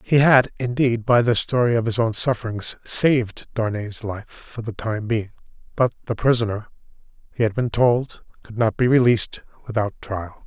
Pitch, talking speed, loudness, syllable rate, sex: 115 Hz, 170 wpm, -21 LUFS, 4.8 syllables/s, male